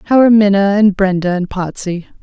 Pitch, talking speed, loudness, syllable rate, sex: 195 Hz, 190 wpm, -13 LUFS, 5.9 syllables/s, female